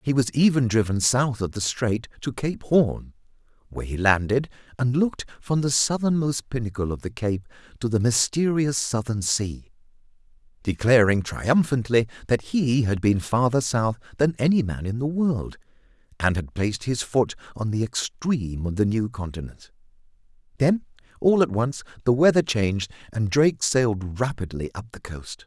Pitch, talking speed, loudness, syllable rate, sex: 120 Hz, 160 wpm, -23 LUFS, 4.9 syllables/s, male